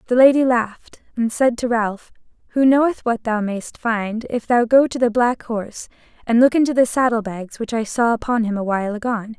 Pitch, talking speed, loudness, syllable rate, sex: 230 Hz, 210 wpm, -19 LUFS, 5.4 syllables/s, female